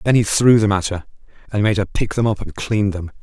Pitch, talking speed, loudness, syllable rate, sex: 105 Hz, 280 wpm, -18 LUFS, 5.8 syllables/s, male